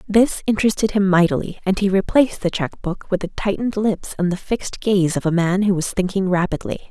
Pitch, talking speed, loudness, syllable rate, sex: 195 Hz, 215 wpm, -19 LUFS, 6.1 syllables/s, female